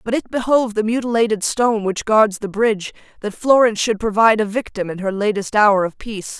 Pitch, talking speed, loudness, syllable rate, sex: 215 Hz, 205 wpm, -17 LUFS, 6.1 syllables/s, female